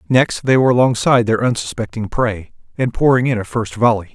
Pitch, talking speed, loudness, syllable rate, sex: 120 Hz, 190 wpm, -16 LUFS, 5.9 syllables/s, male